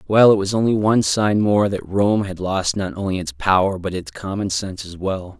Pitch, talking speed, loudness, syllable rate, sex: 95 Hz, 235 wpm, -19 LUFS, 5.2 syllables/s, male